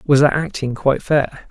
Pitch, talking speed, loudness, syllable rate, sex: 140 Hz, 200 wpm, -18 LUFS, 5.0 syllables/s, male